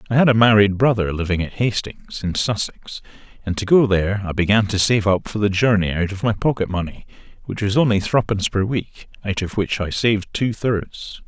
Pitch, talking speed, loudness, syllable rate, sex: 105 Hz, 215 wpm, -19 LUFS, 5.4 syllables/s, male